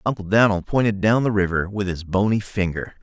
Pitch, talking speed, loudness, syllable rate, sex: 100 Hz, 200 wpm, -21 LUFS, 5.2 syllables/s, male